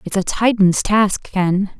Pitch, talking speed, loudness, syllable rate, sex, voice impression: 200 Hz, 165 wpm, -16 LUFS, 3.7 syllables/s, female, feminine, adult-like, soft, intellectual, slightly elegant